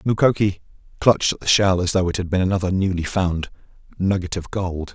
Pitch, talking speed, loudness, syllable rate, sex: 95 Hz, 195 wpm, -20 LUFS, 5.7 syllables/s, male